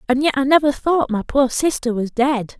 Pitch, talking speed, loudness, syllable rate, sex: 265 Hz, 230 wpm, -18 LUFS, 5.0 syllables/s, female